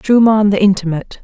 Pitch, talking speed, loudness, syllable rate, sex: 200 Hz, 145 wpm, -13 LUFS, 6.2 syllables/s, female